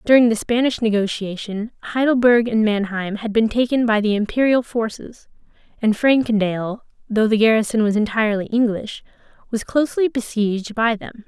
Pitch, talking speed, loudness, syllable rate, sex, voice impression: 225 Hz, 145 wpm, -19 LUFS, 5.4 syllables/s, female, feminine, slightly adult-like, slightly soft, slightly intellectual, slightly calm